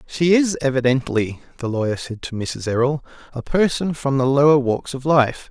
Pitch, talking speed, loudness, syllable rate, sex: 135 Hz, 185 wpm, -19 LUFS, 4.9 syllables/s, male